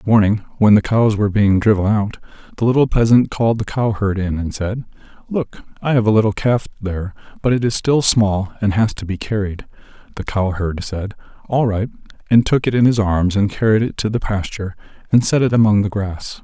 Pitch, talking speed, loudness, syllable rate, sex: 105 Hz, 220 wpm, -17 LUFS, 5.5 syllables/s, male